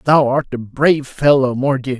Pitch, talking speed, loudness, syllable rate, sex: 135 Hz, 180 wpm, -15 LUFS, 5.0 syllables/s, male